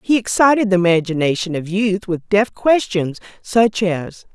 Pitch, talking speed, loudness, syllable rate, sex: 195 Hz, 150 wpm, -17 LUFS, 4.6 syllables/s, female